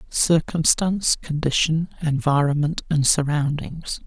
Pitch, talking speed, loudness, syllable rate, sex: 155 Hz, 75 wpm, -21 LUFS, 4.2 syllables/s, male